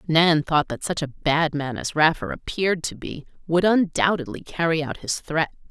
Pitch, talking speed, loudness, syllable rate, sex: 160 Hz, 190 wpm, -22 LUFS, 4.8 syllables/s, female